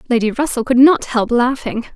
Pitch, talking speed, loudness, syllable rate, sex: 245 Hz, 185 wpm, -15 LUFS, 5.4 syllables/s, female